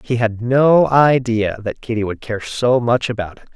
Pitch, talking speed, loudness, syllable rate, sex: 120 Hz, 205 wpm, -17 LUFS, 4.5 syllables/s, male